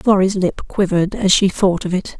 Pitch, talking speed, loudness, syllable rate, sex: 190 Hz, 220 wpm, -17 LUFS, 5.3 syllables/s, female